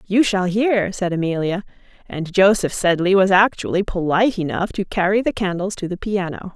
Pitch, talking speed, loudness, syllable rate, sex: 190 Hz, 175 wpm, -19 LUFS, 5.2 syllables/s, female